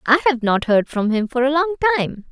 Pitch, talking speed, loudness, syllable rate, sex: 265 Hz, 260 wpm, -18 LUFS, 5.4 syllables/s, female